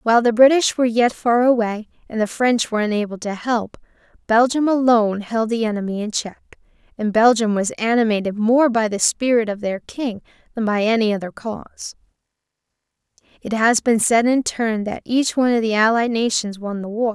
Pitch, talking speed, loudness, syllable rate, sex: 225 Hz, 185 wpm, -19 LUFS, 5.4 syllables/s, female